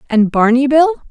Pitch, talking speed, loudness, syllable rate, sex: 265 Hz, 165 wpm, -12 LUFS, 5.1 syllables/s, female